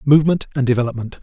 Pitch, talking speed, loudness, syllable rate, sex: 135 Hz, 145 wpm, -18 LUFS, 7.6 syllables/s, male